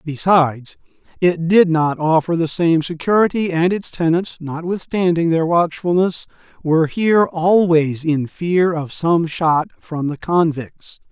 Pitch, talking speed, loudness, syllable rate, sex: 165 Hz, 135 wpm, -17 LUFS, 4.1 syllables/s, male